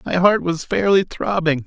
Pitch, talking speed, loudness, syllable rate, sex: 170 Hz, 180 wpm, -18 LUFS, 4.7 syllables/s, male